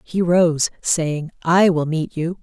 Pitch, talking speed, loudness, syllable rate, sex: 165 Hz, 175 wpm, -18 LUFS, 4.3 syllables/s, female